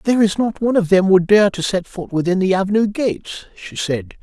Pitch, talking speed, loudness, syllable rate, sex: 195 Hz, 240 wpm, -17 LUFS, 5.8 syllables/s, male